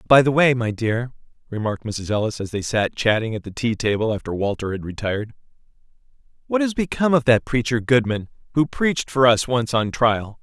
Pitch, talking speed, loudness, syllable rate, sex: 120 Hz, 195 wpm, -21 LUFS, 5.6 syllables/s, male